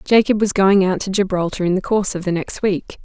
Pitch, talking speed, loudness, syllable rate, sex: 190 Hz, 255 wpm, -18 LUFS, 5.8 syllables/s, female